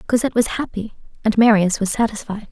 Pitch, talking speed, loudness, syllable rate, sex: 215 Hz, 165 wpm, -18 LUFS, 6.4 syllables/s, female